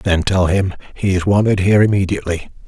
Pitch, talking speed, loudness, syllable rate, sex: 95 Hz, 180 wpm, -16 LUFS, 6.1 syllables/s, male